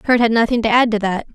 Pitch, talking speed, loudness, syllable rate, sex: 225 Hz, 315 wpm, -16 LUFS, 7.0 syllables/s, female